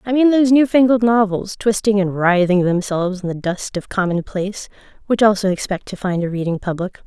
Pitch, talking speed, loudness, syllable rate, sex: 200 Hz, 195 wpm, -17 LUFS, 5.7 syllables/s, female